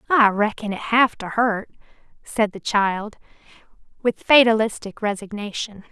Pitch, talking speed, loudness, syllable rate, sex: 215 Hz, 120 wpm, -20 LUFS, 4.4 syllables/s, female